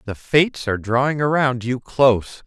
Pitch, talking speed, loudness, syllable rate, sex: 125 Hz, 170 wpm, -19 LUFS, 5.2 syllables/s, male